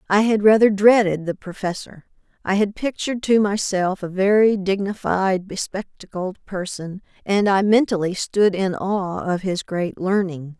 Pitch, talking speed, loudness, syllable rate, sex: 195 Hz, 145 wpm, -20 LUFS, 4.4 syllables/s, female